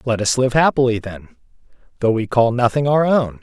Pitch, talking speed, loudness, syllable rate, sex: 120 Hz, 195 wpm, -17 LUFS, 5.2 syllables/s, male